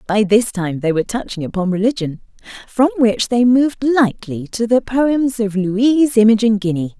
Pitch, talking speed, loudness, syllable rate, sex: 225 Hz, 170 wpm, -16 LUFS, 5.0 syllables/s, female